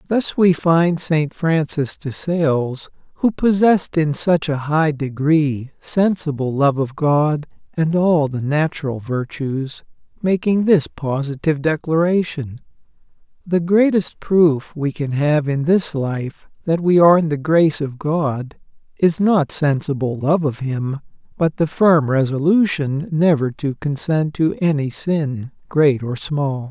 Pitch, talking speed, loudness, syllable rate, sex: 155 Hz, 140 wpm, -18 LUFS, 3.8 syllables/s, male